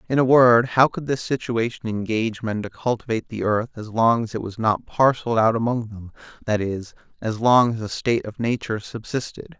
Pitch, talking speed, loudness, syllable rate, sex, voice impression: 115 Hz, 205 wpm, -21 LUFS, 5.5 syllables/s, male, masculine, adult-like, slightly clear, slightly fluent, sincere, calm